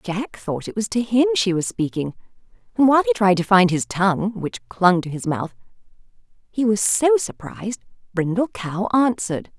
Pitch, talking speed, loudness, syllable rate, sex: 210 Hz, 180 wpm, -20 LUFS, 5.0 syllables/s, female